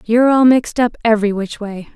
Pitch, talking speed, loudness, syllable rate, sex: 225 Hz, 215 wpm, -14 LUFS, 6.3 syllables/s, female